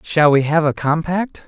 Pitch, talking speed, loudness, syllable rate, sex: 160 Hz, 205 wpm, -17 LUFS, 4.4 syllables/s, male